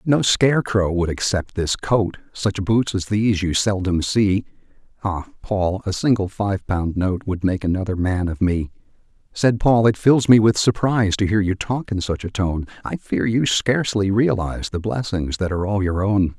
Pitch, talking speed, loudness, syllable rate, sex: 100 Hz, 200 wpm, -20 LUFS, 4.7 syllables/s, male